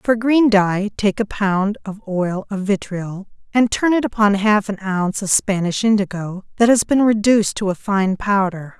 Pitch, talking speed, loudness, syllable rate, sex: 205 Hz, 190 wpm, -18 LUFS, 4.6 syllables/s, female